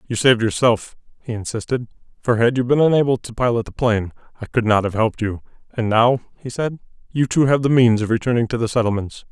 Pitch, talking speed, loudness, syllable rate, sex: 120 Hz, 220 wpm, -19 LUFS, 6.3 syllables/s, male